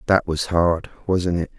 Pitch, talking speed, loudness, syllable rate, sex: 85 Hz, 190 wpm, -21 LUFS, 4.2 syllables/s, male